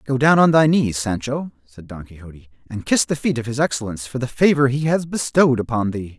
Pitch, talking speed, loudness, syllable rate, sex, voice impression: 125 Hz, 235 wpm, -19 LUFS, 5.9 syllables/s, male, masculine, adult-like, tensed, powerful, bright, clear, fluent, intellectual, friendly, wild, lively, slightly intense, light